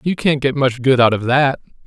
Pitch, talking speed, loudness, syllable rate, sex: 135 Hz, 260 wpm, -16 LUFS, 5.2 syllables/s, male